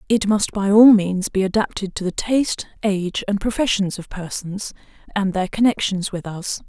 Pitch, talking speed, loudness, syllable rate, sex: 200 Hz, 180 wpm, -20 LUFS, 4.9 syllables/s, female